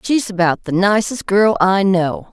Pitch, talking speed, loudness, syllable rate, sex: 190 Hz, 180 wpm, -15 LUFS, 4.1 syllables/s, female